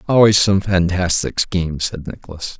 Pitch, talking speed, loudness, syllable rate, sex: 90 Hz, 140 wpm, -16 LUFS, 4.9 syllables/s, male